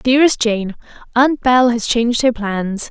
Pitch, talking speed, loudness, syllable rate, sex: 235 Hz, 165 wpm, -15 LUFS, 4.9 syllables/s, female